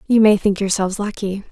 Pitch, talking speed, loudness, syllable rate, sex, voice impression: 200 Hz, 200 wpm, -18 LUFS, 5.9 syllables/s, female, feminine, adult-like, slightly relaxed, slightly bright, soft, slightly muffled, intellectual, calm, friendly, reassuring, elegant, kind, slightly modest